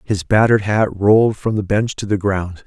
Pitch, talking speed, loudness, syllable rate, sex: 105 Hz, 225 wpm, -16 LUFS, 5.1 syllables/s, male